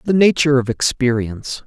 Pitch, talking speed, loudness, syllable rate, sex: 135 Hz, 145 wpm, -16 LUFS, 5.9 syllables/s, male